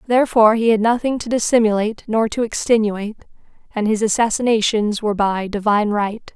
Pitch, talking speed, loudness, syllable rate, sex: 220 Hz, 150 wpm, -18 LUFS, 6.0 syllables/s, female